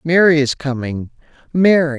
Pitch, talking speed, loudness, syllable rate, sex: 150 Hz, 120 wpm, -16 LUFS, 4.6 syllables/s, male